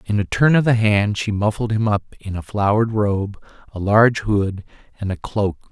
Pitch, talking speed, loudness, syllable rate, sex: 105 Hz, 210 wpm, -19 LUFS, 5.1 syllables/s, male